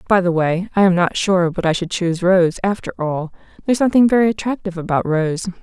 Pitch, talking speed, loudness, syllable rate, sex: 185 Hz, 215 wpm, -17 LUFS, 6.2 syllables/s, female